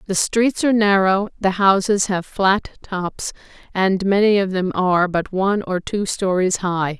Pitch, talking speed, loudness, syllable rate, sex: 190 Hz, 170 wpm, -19 LUFS, 4.4 syllables/s, female